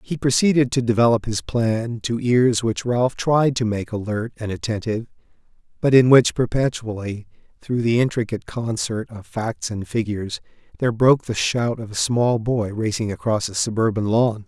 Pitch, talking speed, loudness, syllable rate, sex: 115 Hz, 170 wpm, -21 LUFS, 5.0 syllables/s, male